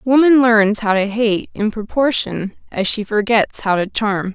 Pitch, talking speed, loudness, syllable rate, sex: 220 Hz, 165 wpm, -16 LUFS, 4.1 syllables/s, female